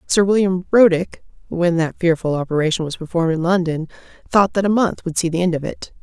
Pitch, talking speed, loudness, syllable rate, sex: 175 Hz, 210 wpm, -18 LUFS, 5.8 syllables/s, female